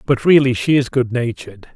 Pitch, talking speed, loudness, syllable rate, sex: 130 Hz, 170 wpm, -16 LUFS, 5.8 syllables/s, male